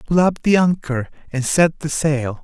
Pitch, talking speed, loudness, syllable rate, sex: 150 Hz, 195 wpm, -18 LUFS, 4.4 syllables/s, male